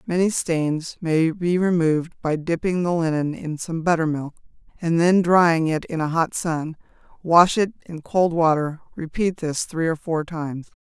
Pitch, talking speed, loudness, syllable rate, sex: 165 Hz, 170 wpm, -21 LUFS, 4.4 syllables/s, female